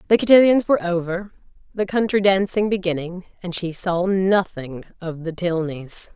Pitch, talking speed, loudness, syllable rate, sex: 185 Hz, 145 wpm, -20 LUFS, 4.8 syllables/s, female